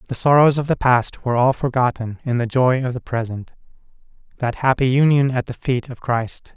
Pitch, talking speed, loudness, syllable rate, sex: 125 Hz, 200 wpm, -19 LUFS, 5.3 syllables/s, male